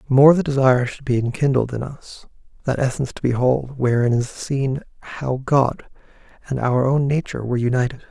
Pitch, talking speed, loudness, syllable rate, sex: 130 Hz, 170 wpm, -20 LUFS, 5.6 syllables/s, male